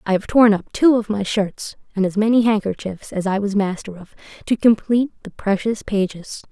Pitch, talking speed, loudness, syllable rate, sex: 205 Hz, 205 wpm, -19 LUFS, 5.2 syllables/s, female